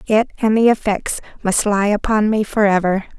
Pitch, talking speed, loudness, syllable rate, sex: 210 Hz, 170 wpm, -17 LUFS, 4.9 syllables/s, female